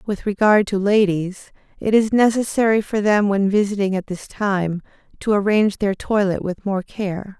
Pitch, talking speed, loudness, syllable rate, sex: 200 Hz, 170 wpm, -19 LUFS, 4.8 syllables/s, female